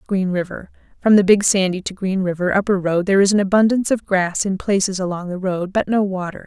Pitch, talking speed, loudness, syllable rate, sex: 190 Hz, 225 wpm, -18 LUFS, 6.0 syllables/s, female